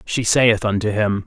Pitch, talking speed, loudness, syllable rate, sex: 110 Hz, 190 wpm, -18 LUFS, 4.3 syllables/s, male